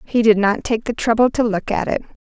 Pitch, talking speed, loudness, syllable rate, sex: 225 Hz, 270 wpm, -18 LUFS, 5.7 syllables/s, female